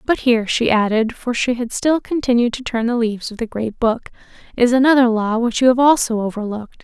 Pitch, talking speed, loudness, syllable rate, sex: 235 Hz, 220 wpm, -17 LUFS, 5.9 syllables/s, female